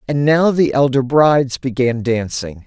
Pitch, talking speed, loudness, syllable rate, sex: 135 Hz, 160 wpm, -15 LUFS, 4.4 syllables/s, male